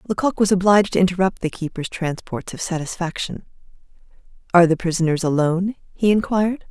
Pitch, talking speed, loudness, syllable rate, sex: 180 Hz, 145 wpm, -20 LUFS, 6.1 syllables/s, female